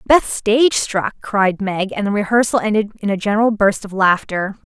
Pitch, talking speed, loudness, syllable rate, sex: 210 Hz, 190 wpm, -17 LUFS, 5.1 syllables/s, female